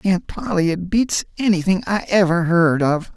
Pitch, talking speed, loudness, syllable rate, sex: 185 Hz, 170 wpm, -18 LUFS, 4.6 syllables/s, male